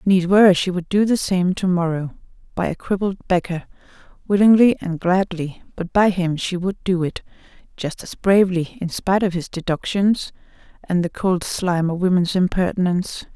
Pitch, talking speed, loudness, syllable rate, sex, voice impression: 185 Hz, 165 wpm, -19 LUFS, 5.2 syllables/s, female, very feminine, slightly middle-aged, very thin, relaxed, weak, dark, very soft, muffled, slightly halting, slightly raspy, cute, intellectual, refreshing, very sincere, very calm, friendly, reassuring, slightly unique, elegant, slightly wild, very sweet, slightly lively, kind, modest